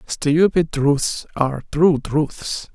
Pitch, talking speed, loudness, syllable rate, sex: 150 Hz, 110 wpm, -19 LUFS, 2.9 syllables/s, male